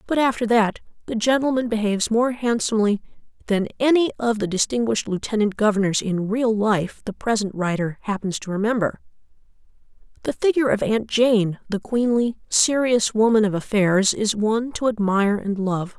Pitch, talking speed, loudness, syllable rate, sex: 220 Hz, 155 wpm, -21 LUFS, 5.3 syllables/s, female